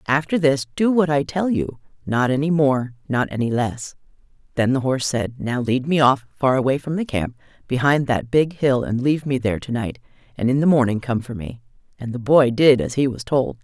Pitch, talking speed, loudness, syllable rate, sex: 130 Hz, 225 wpm, -20 LUFS, 5.3 syllables/s, female